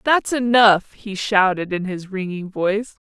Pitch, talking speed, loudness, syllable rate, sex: 205 Hz, 155 wpm, -19 LUFS, 4.2 syllables/s, female